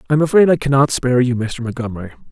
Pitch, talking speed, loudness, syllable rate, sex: 130 Hz, 235 wpm, -16 LUFS, 7.8 syllables/s, male